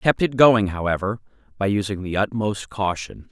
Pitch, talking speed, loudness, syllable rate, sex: 100 Hz, 180 wpm, -21 LUFS, 5.3 syllables/s, male